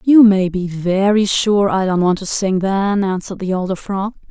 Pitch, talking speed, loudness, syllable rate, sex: 195 Hz, 210 wpm, -16 LUFS, 4.6 syllables/s, female